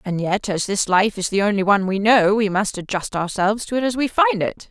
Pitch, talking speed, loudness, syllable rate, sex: 200 Hz, 270 wpm, -19 LUFS, 5.6 syllables/s, female